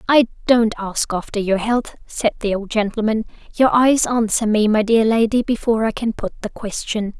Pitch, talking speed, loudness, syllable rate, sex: 220 Hz, 190 wpm, -18 LUFS, 5.0 syllables/s, female